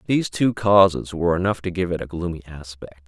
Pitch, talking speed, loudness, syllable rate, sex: 90 Hz, 215 wpm, -21 LUFS, 5.9 syllables/s, male